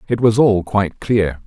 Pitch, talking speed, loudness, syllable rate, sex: 105 Hz, 205 wpm, -16 LUFS, 4.8 syllables/s, male